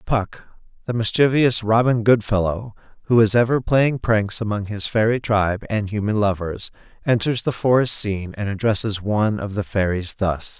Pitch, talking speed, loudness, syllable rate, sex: 110 Hz, 160 wpm, -20 LUFS, 4.9 syllables/s, male